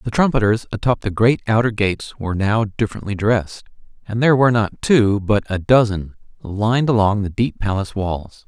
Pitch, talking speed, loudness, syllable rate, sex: 105 Hz, 175 wpm, -18 LUFS, 5.6 syllables/s, male